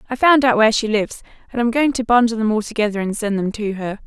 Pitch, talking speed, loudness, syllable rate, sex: 225 Hz, 280 wpm, -18 LUFS, 6.7 syllables/s, female